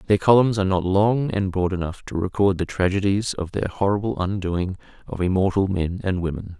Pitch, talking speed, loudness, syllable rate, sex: 95 Hz, 190 wpm, -22 LUFS, 5.4 syllables/s, male